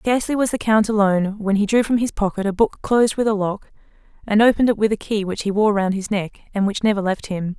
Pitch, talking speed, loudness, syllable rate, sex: 210 Hz, 270 wpm, -19 LUFS, 6.3 syllables/s, female